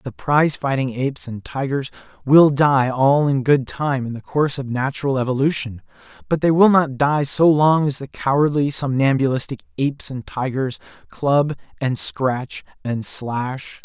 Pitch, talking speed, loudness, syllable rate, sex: 135 Hz, 160 wpm, -19 LUFS, 4.4 syllables/s, male